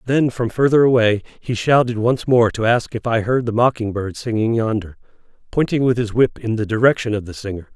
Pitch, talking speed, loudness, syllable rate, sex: 115 Hz, 215 wpm, -18 LUFS, 5.5 syllables/s, male